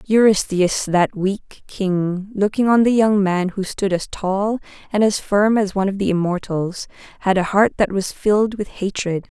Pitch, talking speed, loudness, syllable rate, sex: 200 Hz, 185 wpm, -19 LUFS, 4.4 syllables/s, female